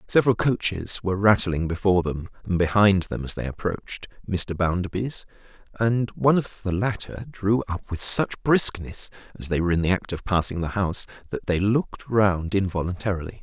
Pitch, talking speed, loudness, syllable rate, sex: 95 Hz, 175 wpm, -23 LUFS, 5.4 syllables/s, male